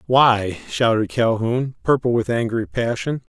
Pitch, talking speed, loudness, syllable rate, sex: 120 Hz, 125 wpm, -20 LUFS, 4.1 syllables/s, male